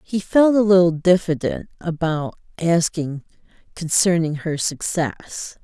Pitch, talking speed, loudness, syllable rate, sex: 170 Hz, 105 wpm, -19 LUFS, 3.9 syllables/s, female